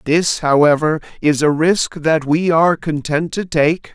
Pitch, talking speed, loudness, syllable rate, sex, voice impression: 155 Hz, 165 wpm, -16 LUFS, 4.2 syllables/s, male, masculine, adult-like, tensed, bright, slightly soft, cool, intellectual, friendly, reassuring, wild, kind